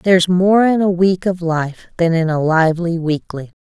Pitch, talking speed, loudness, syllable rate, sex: 175 Hz, 200 wpm, -16 LUFS, 4.7 syllables/s, female